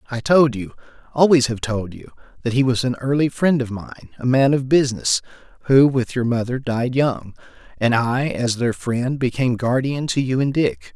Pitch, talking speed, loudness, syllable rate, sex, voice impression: 125 Hz, 185 wpm, -19 LUFS, 5.0 syllables/s, male, masculine, adult-like, tensed, powerful, bright, clear, raspy, intellectual, friendly, wild, lively, slightly kind